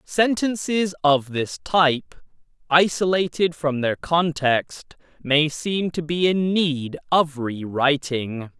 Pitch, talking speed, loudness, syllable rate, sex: 150 Hz, 110 wpm, -21 LUFS, 3.3 syllables/s, male